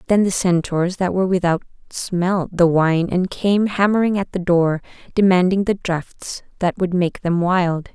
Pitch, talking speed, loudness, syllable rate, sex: 180 Hz, 175 wpm, -19 LUFS, 4.3 syllables/s, female